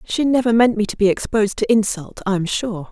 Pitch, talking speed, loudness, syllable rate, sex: 215 Hz, 245 wpm, -18 LUFS, 5.8 syllables/s, female